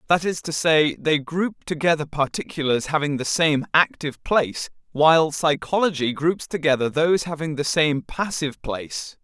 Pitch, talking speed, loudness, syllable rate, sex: 155 Hz, 150 wpm, -22 LUFS, 4.9 syllables/s, male